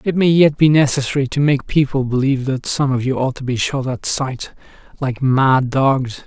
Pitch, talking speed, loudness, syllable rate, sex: 135 Hz, 210 wpm, -17 LUFS, 4.9 syllables/s, male